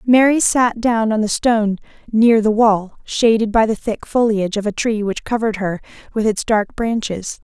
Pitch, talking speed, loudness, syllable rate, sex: 220 Hz, 190 wpm, -17 LUFS, 4.8 syllables/s, female